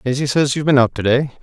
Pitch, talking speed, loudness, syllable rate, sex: 135 Hz, 295 wpm, -16 LUFS, 7.1 syllables/s, male